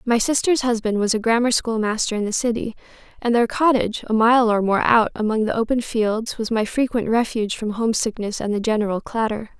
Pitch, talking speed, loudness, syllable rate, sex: 225 Hz, 205 wpm, -20 LUFS, 5.7 syllables/s, female